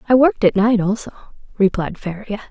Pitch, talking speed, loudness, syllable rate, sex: 215 Hz, 170 wpm, -18 LUFS, 6.2 syllables/s, female